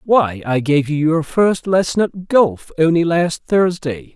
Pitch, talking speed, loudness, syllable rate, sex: 165 Hz, 175 wpm, -16 LUFS, 3.8 syllables/s, male